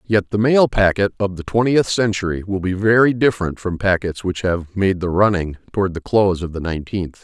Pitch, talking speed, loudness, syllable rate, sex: 95 Hz, 205 wpm, -18 LUFS, 5.5 syllables/s, male